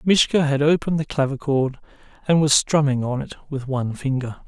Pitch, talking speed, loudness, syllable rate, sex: 140 Hz, 175 wpm, -21 LUFS, 5.7 syllables/s, male